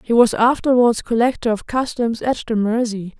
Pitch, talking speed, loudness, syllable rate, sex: 230 Hz, 170 wpm, -18 LUFS, 5.0 syllables/s, female